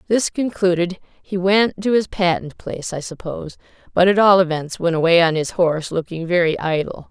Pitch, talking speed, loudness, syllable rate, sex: 180 Hz, 185 wpm, -19 LUFS, 5.3 syllables/s, female